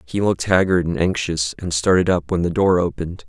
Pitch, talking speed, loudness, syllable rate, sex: 90 Hz, 220 wpm, -19 LUFS, 5.8 syllables/s, male